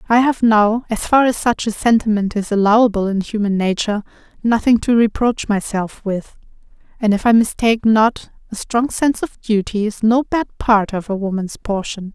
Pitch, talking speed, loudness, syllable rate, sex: 220 Hz, 185 wpm, -17 LUFS, 5.0 syllables/s, female